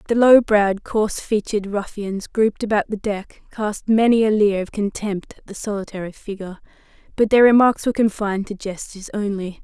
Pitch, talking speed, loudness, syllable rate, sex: 205 Hz, 175 wpm, -19 LUFS, 5.7 syllables/s, female